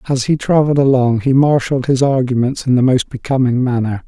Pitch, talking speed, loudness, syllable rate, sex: 130 Hz, 190 wpm, -14 LUFS, 5.9 syllables/s, male